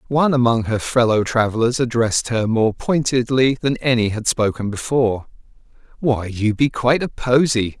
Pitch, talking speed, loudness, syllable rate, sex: 120 Hz, 155 wpm, -18 LUFS, 5.1 syllables/s, male